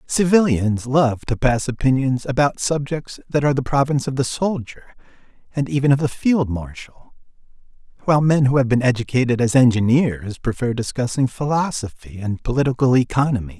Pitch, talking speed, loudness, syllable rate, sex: 130 Hz, 150 wpm, -19 LUFS, 5.4 syllables/s, male